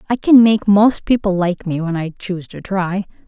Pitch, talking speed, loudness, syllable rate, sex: 195 Hz, 220 wpm, -16 LUFS, 4.9 syllables/s, female